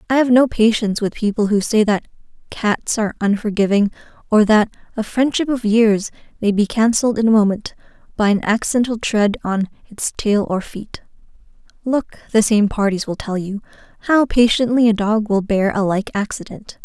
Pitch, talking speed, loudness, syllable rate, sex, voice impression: 215 Hz, 175 wpm, -17 LUFS, 5.2 syllables/s, female, feminine, adult-like, slightly relaxed, slightly dark, soft, slightly muffled, calm, slightly friendly, reassuring, elegant, kind, modest